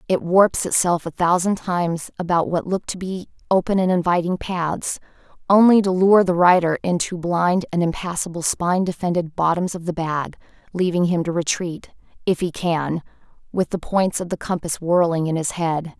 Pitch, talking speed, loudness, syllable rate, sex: 175 Hz, 175 wpm, -20 LUFS, 4.9 syllables/s, female